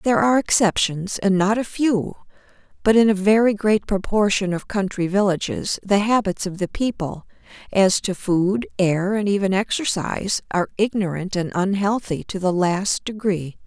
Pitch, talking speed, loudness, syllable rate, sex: 195 Hz, 160 wpm, -20 LUFS, 4.8 syllables/s, female